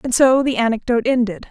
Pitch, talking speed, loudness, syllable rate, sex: 240 Hz, 200 wpm, -17 LUFS, 6.5 syllables/s, female